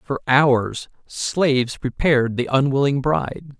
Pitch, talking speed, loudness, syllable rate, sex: 135 Hz, 115 wpm, -19 LUFS, 4.0 syllables/s, male